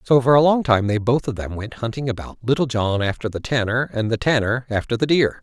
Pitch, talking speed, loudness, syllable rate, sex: 120 Hz, 255 wpm, -20 LUFS, 5.8 syllables/s, male